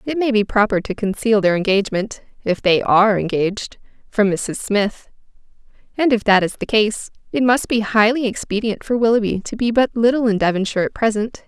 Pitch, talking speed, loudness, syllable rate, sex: 215 Hz, 185 wpm, -18 LUFS, 5.2 syllables/s, female